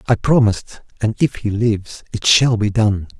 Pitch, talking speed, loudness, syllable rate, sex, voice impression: 110 Hz, 190 wpm, -17 LUFS, 4.9 syllables/s, male, masculine, adult-like, slightly relaxed, slightly weak, soft, raspy, intellectual, calm, mature, reassuring, wild, lively, slightly kind, modest